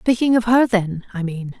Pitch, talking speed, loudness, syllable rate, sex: 210 Hz, 225 wpm, -18 LUFS, 4.9 syllables/s, female